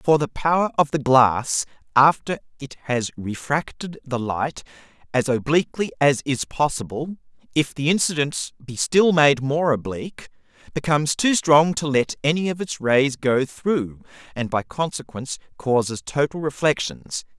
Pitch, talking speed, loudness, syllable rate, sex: 145 Hz, 145 wpm, -21 LUFS, 4.6 syllables/s, male